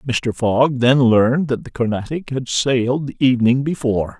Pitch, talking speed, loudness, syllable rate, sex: 125 Hz, 170 wpm, -17 LUFS, 5.0 syllables/s, male